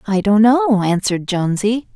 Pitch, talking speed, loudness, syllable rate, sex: 215 Hz, 155 wpm, -16 LUFS, 5.2 syllables/s, female